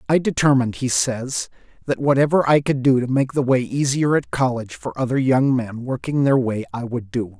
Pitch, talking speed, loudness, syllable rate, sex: 130 Hz, 210 wpm, -20 LUFS, 5.3 syllables/s, male